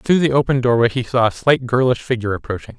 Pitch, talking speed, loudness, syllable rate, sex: 125 Hz, 235 wpm, -17 LUFS, 6.6 syllables/s, male